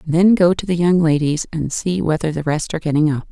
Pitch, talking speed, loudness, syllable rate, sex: 165 Hz, 270 wpm, -17 LUFS, 6.0 syllables/s, female